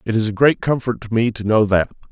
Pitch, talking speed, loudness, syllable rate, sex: 115 Hz, 285 wpm, -18 LUFS, 5.9 syllables/s, male